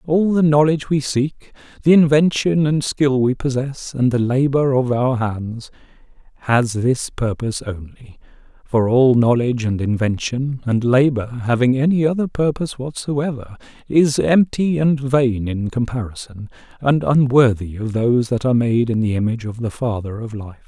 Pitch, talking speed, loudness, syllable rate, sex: 125 Hz, 155 wpm, -18 LUFS, 4.8 syllables/s, male